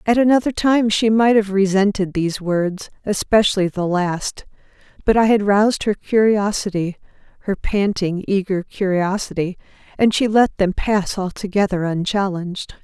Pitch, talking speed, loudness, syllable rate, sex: 200 Hz, 135 wpm, -18 LUFS, 4.7 syllables/s, female